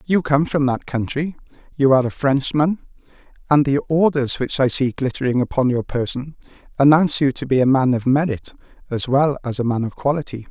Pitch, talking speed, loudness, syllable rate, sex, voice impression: 135 Hz, 195 wpm, -19 LUFS, 5.6 syllables/s, male, very masculine, very adult-like, old, slightly thick, slightly relaxed, slightly weak, dark, slightly soft, slightly muffled, fluent, slightly raspy, cool, intellectual, sincere, very calm, very mature, friendly, reassuring, unique, very elegant, wild, slightly lively, kind, slightly modest